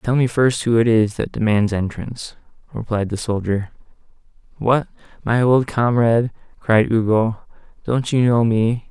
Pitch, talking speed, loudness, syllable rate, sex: 115 Hz, 150 wpm, -18 LUFS, 4.6 syllables/s, male